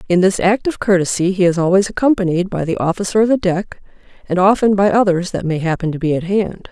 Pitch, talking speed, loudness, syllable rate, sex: 185 Hz, 230 wpm, -16 LUFS, 6.1 syllables/s, female